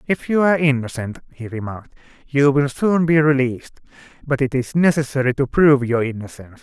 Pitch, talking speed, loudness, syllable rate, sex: 135 Hz, 170 wpm, -18 LUFS, 6.0 syllables/s, male